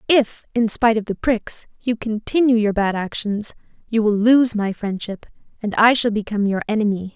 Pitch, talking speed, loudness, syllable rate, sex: 220 Hz, 185 wpm, -19 LUFS, 5.1 syllables/s, female